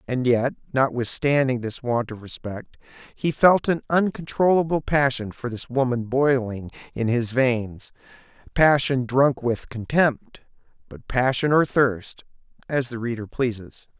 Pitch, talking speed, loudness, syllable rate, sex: 130 Hz, 130 wpm, -22 LUFS, 4.1 syllables/s, male